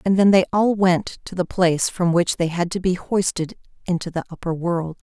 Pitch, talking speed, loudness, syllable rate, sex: 180 Hz, 225 wpm, -21 LUFS, 5.2 syllables/s, female